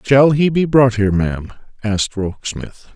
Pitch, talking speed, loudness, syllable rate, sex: 120 Hz, 165 wpm, -16 LUFS, 5.4 syllables/s, male